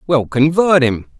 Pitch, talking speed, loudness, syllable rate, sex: 145 Hz, 150 wpm, -14 LUFS, 4.0 syllables/s, male